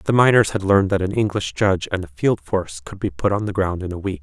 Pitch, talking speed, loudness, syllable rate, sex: 95 Hz, 300 wpm, -20 LUFS, 6.2 syllables/s, male